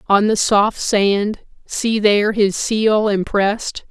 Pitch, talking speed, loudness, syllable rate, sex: 210 Hz, 140 wpm, -17 LUFS, 3.1 syllables/s, female